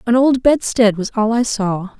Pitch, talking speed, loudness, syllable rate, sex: 225 Hz, 210 wpm, -16 LUFS, 4.3 syllables/s, female